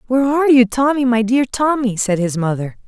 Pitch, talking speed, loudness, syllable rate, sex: 245 Hz, 210 wpm, -16 LUFS, 5.7 syllables/s, female